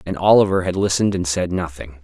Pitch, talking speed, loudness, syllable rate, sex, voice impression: 90 Hz, 205 wpm, -18 LUFS, 6.4 syllables/s, male, masculine, adult-like, slightly refreshing, sincere, slightly friendly